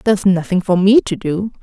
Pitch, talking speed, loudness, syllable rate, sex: 190 Hz, 220 wpm, -15 LUFS, 5.6 syllables/s, female